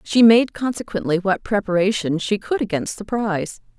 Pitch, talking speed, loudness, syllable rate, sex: 200 Hz, 145 wpm, -20 LUFS, 5.1 syllables/s, female